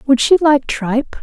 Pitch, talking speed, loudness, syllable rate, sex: 265 Hz, 195 wpm, -14 LUFS, 4.8 syllables/s, female